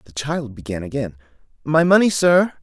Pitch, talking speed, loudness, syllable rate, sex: 140 Hz, 160 wpm, -18 LUFS, 5.0 syllables/s, male